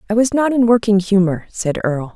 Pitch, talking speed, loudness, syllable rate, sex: 205 Hz, 225 wpm, -16 LUFS, 5.9 syllables/s, female